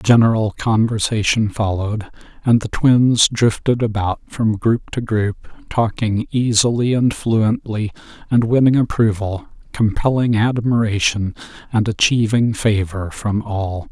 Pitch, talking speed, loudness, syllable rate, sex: 110 Hz, 110 wpm, -17 LUFS, 4.0 syllables/s, male